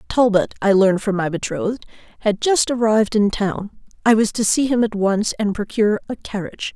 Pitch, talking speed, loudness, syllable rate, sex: 210 Hz, 195 wpm, -19 LUFS, 5.6 syllables/s, female